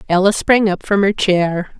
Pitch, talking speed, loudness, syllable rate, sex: 195 Hz, 200 wpm, -15 LUFS, 4.4 syllables/s, female